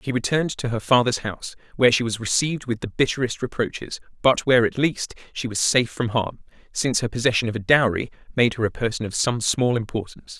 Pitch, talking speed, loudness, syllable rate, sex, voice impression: 120 Hz, 215 wpm, -22 LUFS, 6.3 syllables/s, male, masculine, adult-like, slightly clear, fluent, slightly refreshing, sincere, slightly sharp